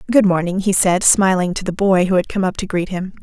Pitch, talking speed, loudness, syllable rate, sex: 185 Hz, 280 wpm, -16 LUFS, 5.8 syllables/s, female